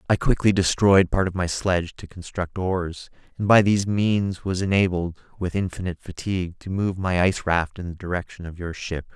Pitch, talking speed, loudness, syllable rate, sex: 90 Hz, 195 wpm, -23 LUFS, 5.4 syllables/s, male